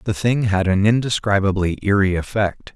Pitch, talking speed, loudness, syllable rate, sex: 100 Hz, 155 wpm, -19 LUFS, 5.1 syllables/s, male